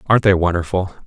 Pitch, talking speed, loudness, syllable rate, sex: 95 Hz, 170 wpm, -17 LUFS, 7.0 syllables/s, male